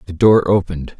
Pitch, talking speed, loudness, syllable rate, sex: 90 Hz, 180 wpm, -14 LUFS, 6.0 syllables/s, male